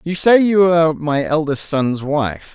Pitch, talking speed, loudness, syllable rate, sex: 155 Hz, 190 wpm, -16 LUFS, 4.1 syllables/s, male